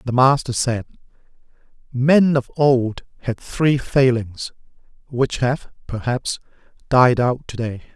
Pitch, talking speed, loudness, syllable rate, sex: 125 Hz, 120 wpm, -19 LUFS, 3.7 syllables/s, male